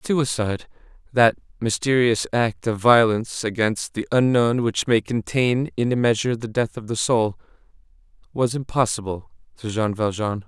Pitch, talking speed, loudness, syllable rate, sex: 115 Hz, 145 wpm, -21 LUFS, 4.7 syllables/s, male